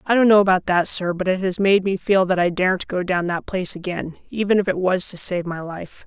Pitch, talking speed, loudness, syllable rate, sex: 185 Hz, 275 wpm, -19 LUFS, 5.7 syllables/s, female